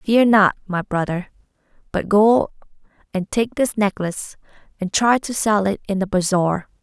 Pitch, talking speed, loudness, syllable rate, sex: 200 Hz, 160 wpm, -19 LUFS, 4.5 syllables/s, female